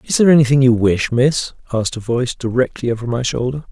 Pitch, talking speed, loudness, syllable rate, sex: 125 Hz, 210 wpm, -16 LUFS, 6.5 syllables/s, male